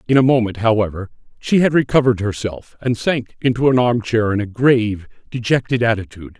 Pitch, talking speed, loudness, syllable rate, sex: 115 Hz, 170 wpm, -17 LUFS, 5.8 syllables/s, male